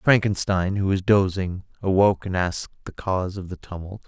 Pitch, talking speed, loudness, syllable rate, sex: 95 Hz, 175 wpm, -23 LUFS, 5.4 syllables/s, male